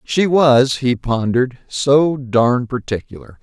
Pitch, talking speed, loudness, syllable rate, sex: 130 Hz, 125 wpm, -16 LUFS, 3.7 syllables/s, male